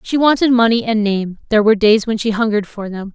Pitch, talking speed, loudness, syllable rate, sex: 220 Hz, 250 wpm, -15 LUFS, 6.5 syllables/s, female